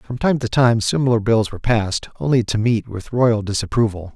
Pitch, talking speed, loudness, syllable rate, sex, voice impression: 115 Hz, 200 wpm, -19 LUFS, 5.4 syllables/s, male, masculine, adult-like, tensed, slightly powerful, clear, fluent, cool, sincere, calm, slightly mature, wild, slightly lively, slightly kind